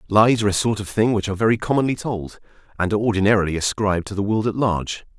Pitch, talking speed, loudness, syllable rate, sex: 105 Hz, 230 wpm, -20 LUFS, 7.3 syllables/s, male